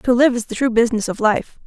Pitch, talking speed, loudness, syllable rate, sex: 235 Hz, 290 wpm, -18 LUFS, 6.3 syllables/s, female